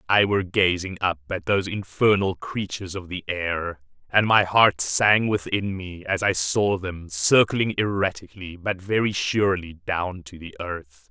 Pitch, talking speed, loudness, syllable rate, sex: 95 Hz, 160 wpm, -23 LUFS, 4.5 syllables/s, male